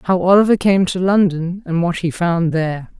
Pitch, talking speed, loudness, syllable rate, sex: 175 Hz, 200 wpm, -16 LUFS, 5.1 syllables/s, female